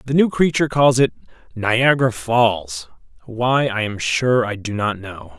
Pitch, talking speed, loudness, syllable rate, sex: 115 Hz, 155 wpm, -18 LUFS, 4.2 syllables/s, male